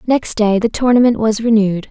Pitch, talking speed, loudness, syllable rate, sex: 220 Hz, 190 wpm, -14 LUFS, 5.7 syllables/s, female